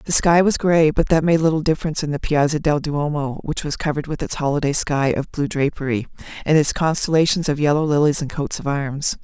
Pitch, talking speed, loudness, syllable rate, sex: 150 Hz, 220 wpm, -19 LUFS, 5.8 syllables/s, female